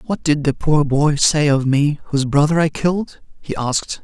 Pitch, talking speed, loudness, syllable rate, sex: 145 Hz, 210 wpm, -17 LUFS, 4.9 syllables/s, male